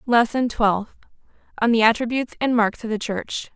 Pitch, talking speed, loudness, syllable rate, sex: 230 Hz, 170 wpm, -21 LUFS, 5.2 syllables/s, female